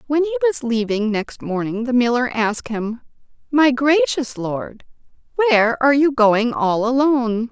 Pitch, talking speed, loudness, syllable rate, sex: 250 Hz, 150 wpm, -18 LUFS, 4.8 syllables/s, female